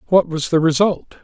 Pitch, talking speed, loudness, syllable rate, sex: 170 Hz, 195 wpm, -17 LUFS, 5.2 syllables/s, male